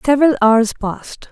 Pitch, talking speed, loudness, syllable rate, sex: 240 Hz, 135 wpm, -15 LUFS, 5.8 syllables/s, female